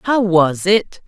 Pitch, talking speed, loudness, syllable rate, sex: 190 Hz, 170 wpm, -15 LUFS, 3.0 syllables/s, female